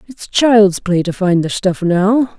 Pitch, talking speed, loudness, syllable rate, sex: 200 Hz, 200 wpm, -14 LUFS, 3.6 syllables/s, female